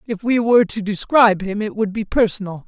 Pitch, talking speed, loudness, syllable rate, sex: 210 Hz, 225 wpm, -17 LUFS, 5.9 syllables/s, male